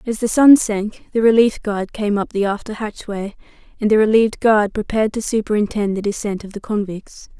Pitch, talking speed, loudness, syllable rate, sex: 210 Hz, 195 wpm, -18 LUFS, 5.4 syllables/s, female